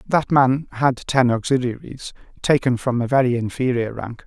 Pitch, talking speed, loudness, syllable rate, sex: 125 Hz, 155 wpm, -20 LUFS, 4.7 syllables/s, male